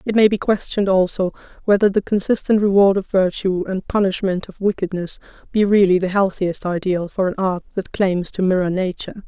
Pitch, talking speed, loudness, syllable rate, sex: 190 Hz, 180 wpm, -19 LUFS, 5.6 syllables/s, female